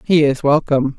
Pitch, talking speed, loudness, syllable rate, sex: 145 Hz, 185 wpm, -15 LUFS, 5.6 syllables/s, female